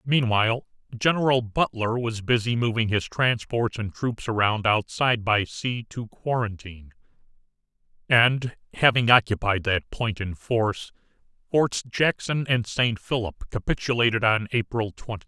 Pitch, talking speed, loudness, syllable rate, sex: 115 Hz, 130 wpm, -24 LUFS, 4.7 syllables/s, male